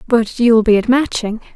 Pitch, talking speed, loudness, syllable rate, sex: 230 Hz, 195 wpm, -14 LUFS, 4.7 syllables/s, female